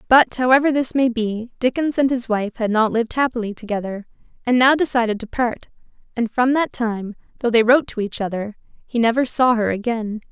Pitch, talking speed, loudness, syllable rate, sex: 235 Hz, 200 wpm, -19 LUFS, 5.6 syllables/s, female